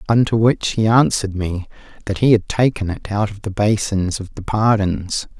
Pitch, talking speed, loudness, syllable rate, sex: 105 Hz, 190 wpm, -18 LUFS, 4.9 syllables/s, male